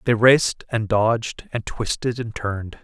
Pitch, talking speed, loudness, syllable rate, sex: 110 Hz, 170 wpm, -21 LUFS, 4.6 syllables/s, male